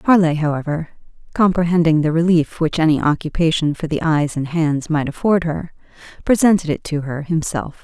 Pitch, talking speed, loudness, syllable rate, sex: 160 Hz, 160 wpm, -18 LUFS, 5.3 syllables/s, female